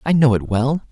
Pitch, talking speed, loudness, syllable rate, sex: 130 Hz, 260 wpm, -17 LUFS, 5.3 syllables/s, male